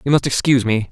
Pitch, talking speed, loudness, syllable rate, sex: 125 Hz, 265 wpm, -16 LUFS, 7.4 syllables/s, male